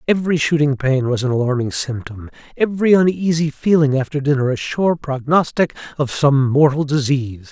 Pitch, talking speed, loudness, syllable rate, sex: 145 Hz, 145 wpm, -17 LUFS, 5.4 syllables/s, male